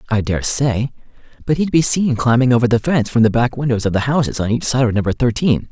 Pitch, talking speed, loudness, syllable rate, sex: 120 Hz, 240 wpm, -16 LUFS, 6.2 syllables/s, male